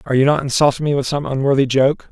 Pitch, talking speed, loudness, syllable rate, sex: 140 Hz, 255 wpm, -16 LUFS, 7.0 syllables/s, male